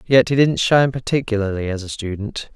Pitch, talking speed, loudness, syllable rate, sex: 115 Hz, 190 wpm, -19 LUFS, 5.8 syllables/s, male